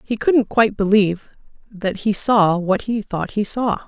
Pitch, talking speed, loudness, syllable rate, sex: 210 Hz, 185 wpm, -18 LUFS, 4.5 syllables/s, female